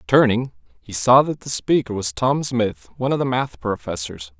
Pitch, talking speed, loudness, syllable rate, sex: 125 Hz, 190 wpm, -20 LUFS, 4.9 syllables/s, male